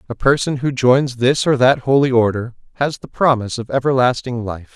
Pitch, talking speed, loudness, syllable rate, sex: 125 Hz, 190 wpm, -17 LUFS, 5.3 syllables/s, male